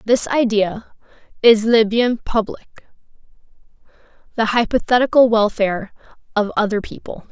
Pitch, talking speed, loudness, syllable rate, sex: 220 Hz, 100 wpm, -17 LUFS, 4.6 syllables/s, female